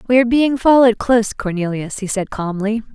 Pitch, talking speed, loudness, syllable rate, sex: 225 Hz, 185 wpm, -16 LUFS, 6.0 syllables/s, female